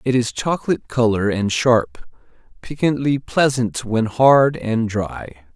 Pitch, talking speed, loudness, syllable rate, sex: 120 Hz, 130 wpm, -18 LUFS, 4.0 syllables/s, male